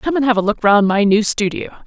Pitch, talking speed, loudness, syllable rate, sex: 220 Hz, 290 wpm, -15 LUFS, 5.7 syllables/s, female